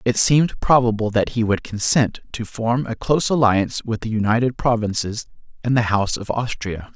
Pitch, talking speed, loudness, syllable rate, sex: 115 Hz, 180 wpm, -20 LUFS, 5.3 syllables/s, male